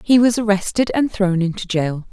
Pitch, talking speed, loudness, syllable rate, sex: 205 Hz, 200 wpm, -18 LUFS, 5.0 syllables/s, female